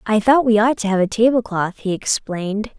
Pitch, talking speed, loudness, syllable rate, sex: 215 Hz, 215 wpm, -18 LUFS, 5.3 syllables/s, female